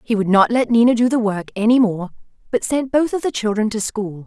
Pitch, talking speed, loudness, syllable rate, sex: 225 Hz, 255 wpm, -18 LUFS, 5.8 syllables/s, female